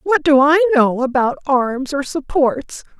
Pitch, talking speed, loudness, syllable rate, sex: 285 Hz, 160 wpm, -16 LUFS, 3.9 syllables/s, female